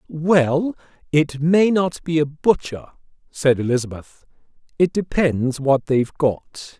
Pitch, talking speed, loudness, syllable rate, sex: 150 Hz, 125 wpm, -19 LUFS, 3.8 syllables/s, male